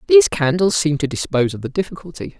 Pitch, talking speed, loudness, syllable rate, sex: 165 Hz, 200 wpm, -18 LUFS, 7.3 syllables/s, male